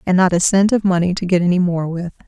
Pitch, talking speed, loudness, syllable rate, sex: 180 Hz, 290 wpm, -16 LUFS, 6.4 syllables/s, female